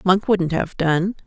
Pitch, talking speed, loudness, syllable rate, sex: 185 Hz, 190 wpm, -20 LUFS, 3.7 syllables/s, female